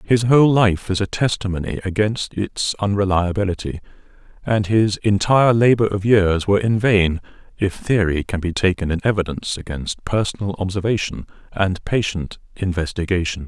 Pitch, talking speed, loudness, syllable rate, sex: 100 Hz, 140 wpm, -19 LUFS, 5.1 syllables/s, male